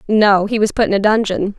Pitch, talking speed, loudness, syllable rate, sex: 205 Hz, 265 wpm, -15 LUFS, 5.6 syllables/s, female